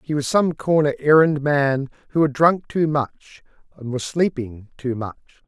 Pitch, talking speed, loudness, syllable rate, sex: 145 Hz, 175 wpm, -20 LUFS, 4.3 syllables/s, male